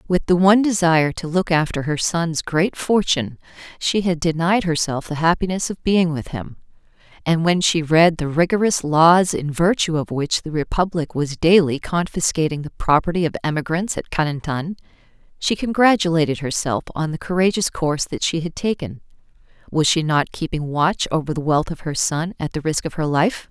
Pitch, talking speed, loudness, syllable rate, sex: 165 Hz, 180 wpm, -19 LUFS, 5.2 syllables/s, female